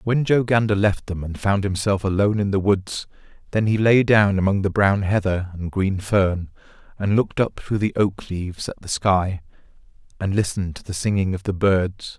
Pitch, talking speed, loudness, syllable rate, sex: 100 Hz, 200 wpm, -21 LUFS, 5.0 syllables/s, male